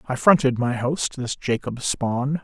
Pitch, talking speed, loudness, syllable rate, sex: 130 Hz, 175 wpm, -22 LUFS, 3.9 syllables/s, male